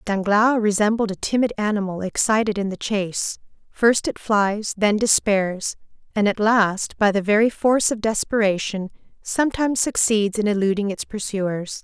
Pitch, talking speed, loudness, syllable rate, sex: 210 Hz, 145 wpm, -20 LUFS, 4.8 syllables/s, female